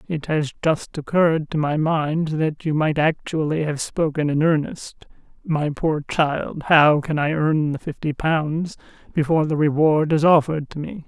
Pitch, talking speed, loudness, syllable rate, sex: 155 Hz, 175 wpm, -21 LUFS, 4.4 syllables/s, female